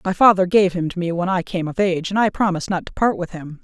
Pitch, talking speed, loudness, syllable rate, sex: 180 Hz, 315 wpm, -19 LUFS, 6.5 syllables/s, female